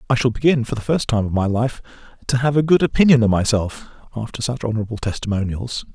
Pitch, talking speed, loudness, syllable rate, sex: 120 Hz, 210 wpm, -19 LUFS, 6.4 syllables/s, male